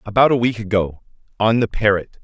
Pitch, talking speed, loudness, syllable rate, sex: 105 Hz, 190 wpm, -18 LUFS, 5.7 syllables/s, male